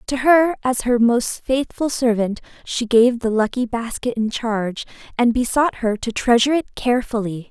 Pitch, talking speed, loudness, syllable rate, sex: 240 Hz, 170 wpm, -19 LUFS, 4.8 syllables/s, female